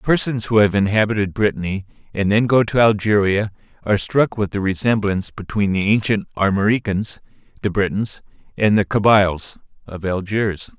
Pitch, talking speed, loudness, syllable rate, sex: 100 Hz, 145 wpm, -18 LUFS, 5.2 syllables/s, male